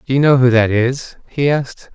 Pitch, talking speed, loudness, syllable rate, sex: 130 Hz, 245 wpm, -14 LUFS, 5.2 syllables/s, male